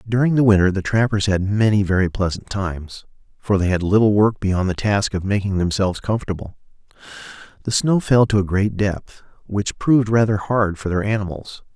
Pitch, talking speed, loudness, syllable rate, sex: 100 Hz, 185 wpm, -19 LUFS, 5.5 syllables/s, male